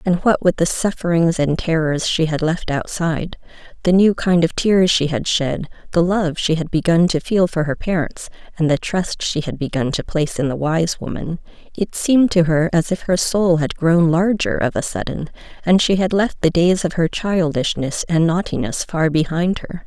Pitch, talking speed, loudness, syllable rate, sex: 170 Hz, 210 wpm, -18 LUFS, 4.8 syllables/s, female